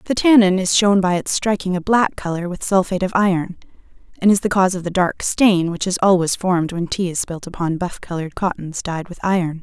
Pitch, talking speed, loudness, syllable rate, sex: 185 Hz, 230 wpm, -18 LUFS, 5.8 syllables/s, female